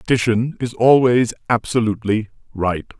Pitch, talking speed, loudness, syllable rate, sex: 115 Hz, 100 wpm, -18 LUFS, 4.6 syllables/s, male